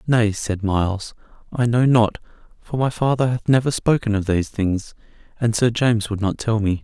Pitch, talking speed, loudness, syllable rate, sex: 110 Hz, 195 wpm, -20 LUFS, 5.2 syllables/s, male